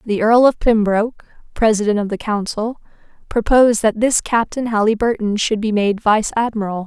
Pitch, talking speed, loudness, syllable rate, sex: 220 Hz, 155 wpm, -17 LUFS, 5.2 syllables/s, female